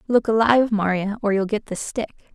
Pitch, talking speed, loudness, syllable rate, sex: 215 Hz, 205 wpm, -21 LUFS, 5.9 syllables/s, female